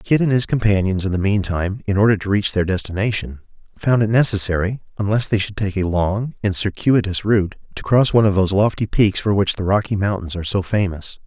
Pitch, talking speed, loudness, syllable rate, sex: 100 Hz, 220 wpm, -18 LUFS, 5.9 syllables/s, male